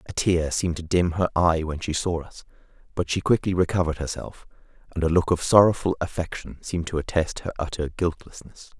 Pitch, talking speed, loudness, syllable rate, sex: 85 Hz, 190 wpm, -24 LUFS, 5.9 syllables/s, male